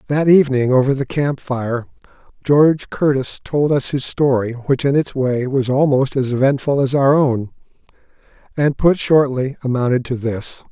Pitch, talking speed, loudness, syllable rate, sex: 135 Hz, 160 wpm, -17 LUFS, 4.7 syllables/s, male